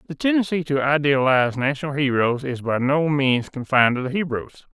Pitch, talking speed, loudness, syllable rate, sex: 140 Hz, 175 wpm, -21 LUFS, 5.5 syllables/s, male